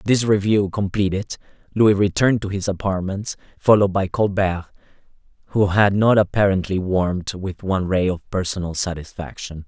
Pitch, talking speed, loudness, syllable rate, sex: 95 Hz, 135 wpm, -20 LUFS, 5.1 syllables/s, male